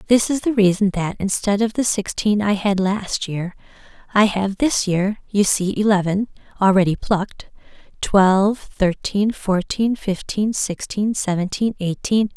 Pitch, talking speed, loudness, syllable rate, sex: 200 Hz, 135 wpm, -19 LUFS, 4.3 syllables/s, female